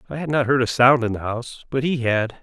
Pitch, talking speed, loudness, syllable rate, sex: 125 Hz, 295 wpm, -20 LUFS, 5.9 syllables/s, male